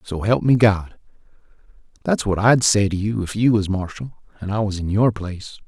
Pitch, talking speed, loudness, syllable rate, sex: 105 Hz, 210 wpm, -19 LUFS, 5.1 syllables/s, male